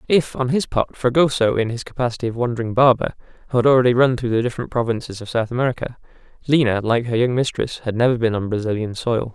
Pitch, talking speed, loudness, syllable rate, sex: 120 Hz, 205 wpm, -20 LUFS, 6.5 syllables/s, male